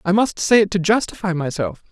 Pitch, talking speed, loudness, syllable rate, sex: 185 Hz, 220 wpm, -18 LUFS, 5.7 syllables/s, male